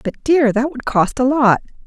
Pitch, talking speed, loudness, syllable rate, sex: 260 Hz, 225 wpm, -16 LUFS, 4.6 syllables/s, female